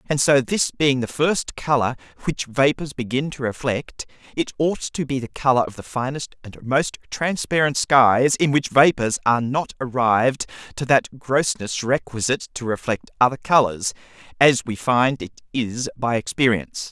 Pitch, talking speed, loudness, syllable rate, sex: 130 Hz, 165 wpm, -21 LUFS, 4.6 syllables/s, male